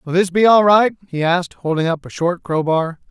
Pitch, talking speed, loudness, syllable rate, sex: 175 Hz, 250 wpm, -16 LUFS, 5.4 syllables/s, male